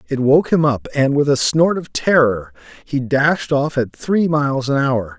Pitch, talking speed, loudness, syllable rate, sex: 140 Hz, 210 wpm, -17 LUFS, 4.3 syllables/s, male